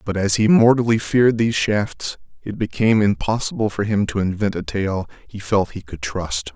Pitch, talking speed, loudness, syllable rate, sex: 105 Hz, 190 wpm, -19 LUFS, 5.1 syllables/s, male